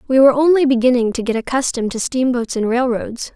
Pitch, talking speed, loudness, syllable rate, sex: 250 Hz, 195 wpm, -16 LUFS, 6.3 syllables/s, female